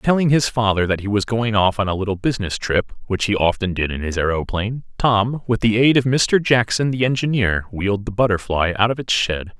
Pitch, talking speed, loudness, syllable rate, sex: 110 Hz, 225 wpm, -19 LUFS, 5.6 syllables/s, male